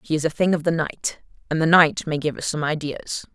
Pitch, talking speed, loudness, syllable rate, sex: 160 Hz, 270 wpm, -22 LUFS, 5.4 syllables/s, female